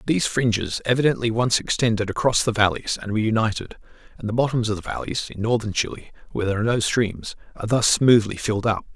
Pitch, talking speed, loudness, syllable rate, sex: 110 Hz, 200 wpm, -22 LUFS, 6.7 syllables/s, male